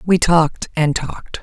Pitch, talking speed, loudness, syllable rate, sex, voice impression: 160 Hz, 170 wpm, -17 LUFS, 4.7 syllables/s, female, feminine, adult-like, sincere, calm, elegant